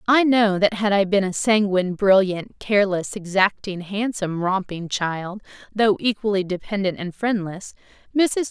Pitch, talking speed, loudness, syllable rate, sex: 200 Hz, 125 wpm, -21 LUFS, 4.6 syllables/s, female